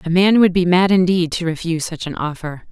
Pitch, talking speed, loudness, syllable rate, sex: 175 Hz, 245 wpm, -17 LUFS, 5.8 syllables/s, female